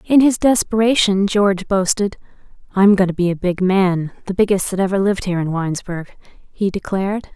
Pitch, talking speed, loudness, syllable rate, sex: 195 Hz, 180 wpm, -17 LUFS, 5.5 syllables/s, female